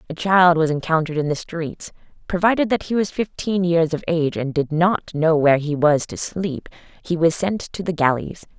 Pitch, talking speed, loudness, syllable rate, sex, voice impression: 165 Hz, 210 wpm, -20 LUFS, 5.2 syllables/s, female, feminine, very adult-like, slightly intellectual, calm, slightly elegant